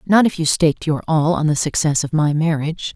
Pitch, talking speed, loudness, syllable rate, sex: 155 Hz, 245 wpm, -18 LUFS, 5.7 syllables/s, female